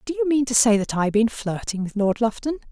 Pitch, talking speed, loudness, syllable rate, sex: 235 Hz, 285 wpm, -21 LUFS, 6.0 syllables/s, female